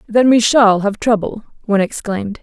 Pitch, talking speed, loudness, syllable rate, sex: 215 Hz, 175 wpm, -14 LUFS, 5.4 syllables/s, female